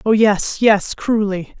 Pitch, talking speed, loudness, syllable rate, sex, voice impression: 210 Hz, 150 wpm, -16 LUFS, 3.4 syllables/s, female, feminine, slightly middle-aged, sincere, slightly calm, slightly strict